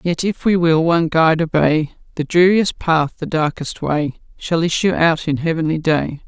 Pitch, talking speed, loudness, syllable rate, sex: 165 Hz, 180 wpm, -17 LUFS, 4.8 syllables/s, female